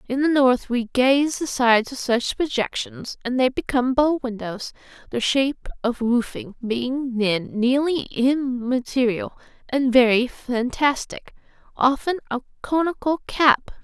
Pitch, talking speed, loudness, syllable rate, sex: 260 Hz, 130 wpm, -21 LUFS, 4.2 syllables/s, female